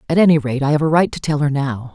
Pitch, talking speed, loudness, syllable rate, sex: 145 Hz, 340 wpm, -17 LUFS, 6.8 syllables/s, female